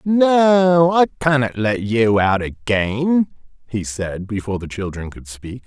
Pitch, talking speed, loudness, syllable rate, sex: 130 Hz, 150 wpm, -18 LUFS, 3.6 syllables/s, male